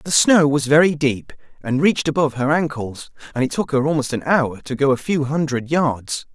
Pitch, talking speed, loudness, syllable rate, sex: 140 Hz, 220 wpm, -19 LUFS, 5.3 syllables/s, male